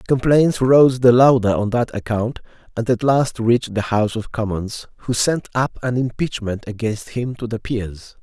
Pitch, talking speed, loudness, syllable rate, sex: 120 Hz, 180 wpm, -18 LUFS, 4.6 syllables/s, male